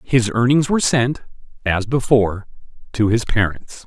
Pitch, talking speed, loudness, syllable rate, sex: 120 Hz, 140 wpm, -18 LUFS, 4.8 syllables/s, male